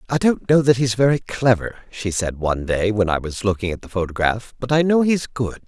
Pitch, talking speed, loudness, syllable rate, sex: 115 Hz, 245 wpm, -20 LUFS, 5.4 syllables/s, male